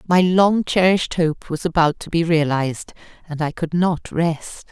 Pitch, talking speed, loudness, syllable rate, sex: 165 Hz, 180 wpm, -19 LUFS, 4.8 syllables/s, female